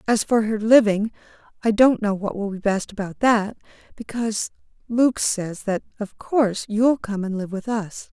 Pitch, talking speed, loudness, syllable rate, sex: 215 Hz, 185 wpm, -21 LUFS, 4.6 syllables/s, female